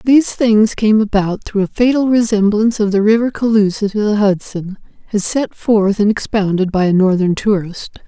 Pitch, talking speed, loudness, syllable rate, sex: 210 Hz, 180 wpm, -14 LUFS, 5.1 syllables/s, female